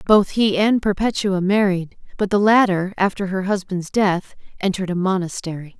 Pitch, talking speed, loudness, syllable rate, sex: 195 Hz, 155 wpm, -19 LUFS, 5.0 syllables/s, female